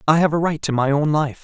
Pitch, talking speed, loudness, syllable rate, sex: 150 Hz, 335 wpm, -19 LUFS, 6.2 syllables/s, male